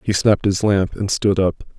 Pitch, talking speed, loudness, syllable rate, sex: 100 Hz, 235 wpm, -18 LUFS, 5.0 syllables/s, male